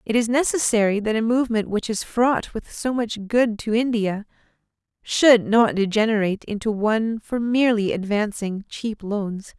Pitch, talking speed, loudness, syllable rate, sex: 220 Hz, 155 wpm, -21 LUFS, 4.7 syllables/s, female